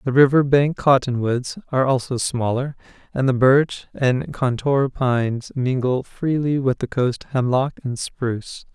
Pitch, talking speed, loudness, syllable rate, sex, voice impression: 130 Hz, 145 wpm, -20 LUFS, 4.3 syllables/s, male, very masculine, very adult-like, middle-aged, very thick, relaxed, weak, slightly dark, slightly soft, slightly muffled, fluent, slightly cool, intellectual, slightly refreshing, sincere, calm, slightly mature, slightly friendly, reassuring, elegant, slightly wild, slightly sweet, very kind, modest